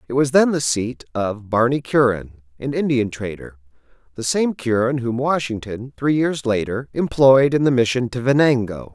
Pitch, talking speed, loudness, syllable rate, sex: 125 Hz, 160 wpm, -19 LUFS, 4.7 syllables/s, male